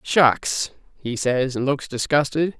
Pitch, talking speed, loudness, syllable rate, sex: 135 Hz, 140 wpm, -21 LUFS, 4.0 syllables/s, male